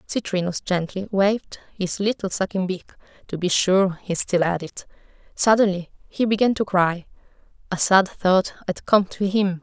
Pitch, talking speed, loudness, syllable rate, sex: 190 Hz, 160 wpm, -21 LUFS, 4.6 syllables/s, female